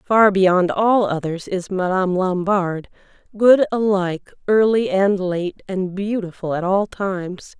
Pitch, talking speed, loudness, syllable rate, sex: 190 Hz, 135 wpm, -19 LUFS, 4.0 syllables/s, female